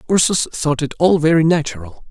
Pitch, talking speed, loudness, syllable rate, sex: 150 Hz, 170 wpm, -16 LUFS, 5.7 syllables/s, male